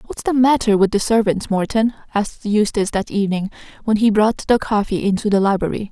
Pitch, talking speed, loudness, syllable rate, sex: 210 Hz, 195 wpm, -18 LUFS, 6.0 syllables/s, female